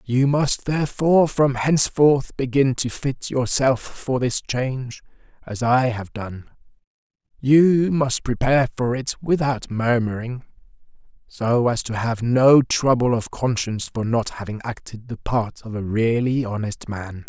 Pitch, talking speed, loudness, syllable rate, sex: 125 Hz, 145 wpm, -21 LUFS, 4.2 syllables/s, male